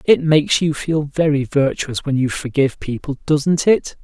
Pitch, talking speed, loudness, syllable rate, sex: 145 Hz, 180 wpm, -18 LUFS, 4.7 syllables/s, male